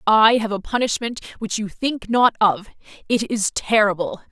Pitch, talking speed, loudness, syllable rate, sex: 215 Hz, 165 wpm, -20 LUFS, 4.4 syllables/s, female